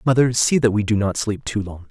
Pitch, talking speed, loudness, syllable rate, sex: 110 Hz, 285 wpm, -19 LUFS, 5.7 syllables/s, male